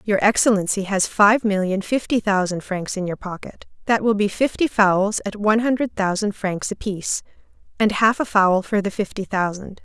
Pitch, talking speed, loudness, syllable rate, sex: 205 Hz, 185 wpm, -20 LUFS, 5.0 syllables/s, female